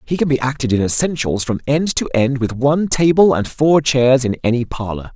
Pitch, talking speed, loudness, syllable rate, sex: 130 Hz, 220 wpm, -16 LUFS, 5.3 syllables/s, male